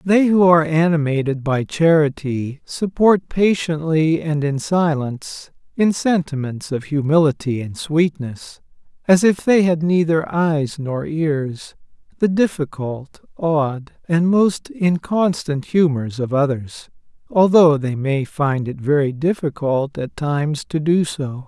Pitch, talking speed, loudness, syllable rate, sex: 155 Hz, 130 wpm, -18 LUFS, 3.8 syllables/s, male